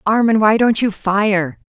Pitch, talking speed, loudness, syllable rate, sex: 205 Hz, 180 wpm, -15 LUFS, 4.0 syllables/s, female